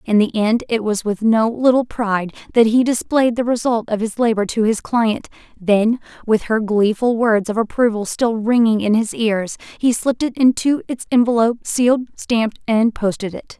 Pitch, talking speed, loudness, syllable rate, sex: 225 Hz, 190 wpm, -17 LUFS, 5.0 syllables/s, female